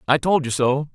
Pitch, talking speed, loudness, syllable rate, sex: 140 Hz, 255 wpm, -20 LUFS, 5.3 syllables/s, male